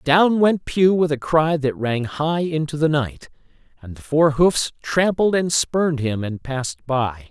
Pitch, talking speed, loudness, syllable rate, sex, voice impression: 150 Hz, 190 wpm, -20 LUFS, 4.1 syllables/s, male, very masculine, very adult-like, very middle-aged, very thick, tensed, powerful, very bright, soft, very clear, fluent, cool, very intellectual, very refreshing, very sincere, very calm, mature, very friendly, very reassuring, very unique, elegant, slightly wild, very sweet, very lively, very kind, slightly intense, slightly light